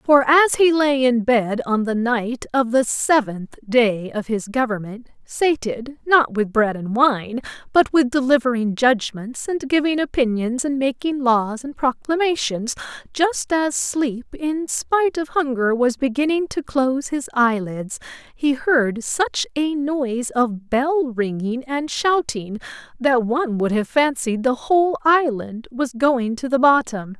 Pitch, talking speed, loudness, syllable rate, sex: 255 Hz, 155 wpm, -20 LUFS, 4.0 syllables/s, female